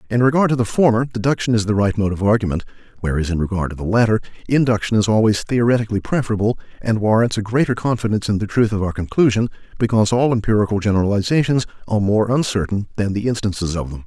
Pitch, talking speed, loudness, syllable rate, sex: 110 Hz, 195 wpm, -18 LUFS, 7.0 syllables/s, male